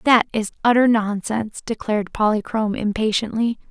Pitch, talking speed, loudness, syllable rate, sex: 220 Hz, 115 wpm, -20 LUFS, 5.5 syllables/s, female